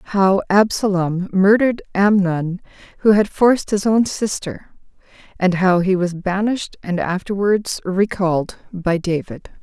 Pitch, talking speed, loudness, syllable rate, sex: 190 Hz, 125 wpm, -18 LUFS, 4.3 syllables/s, female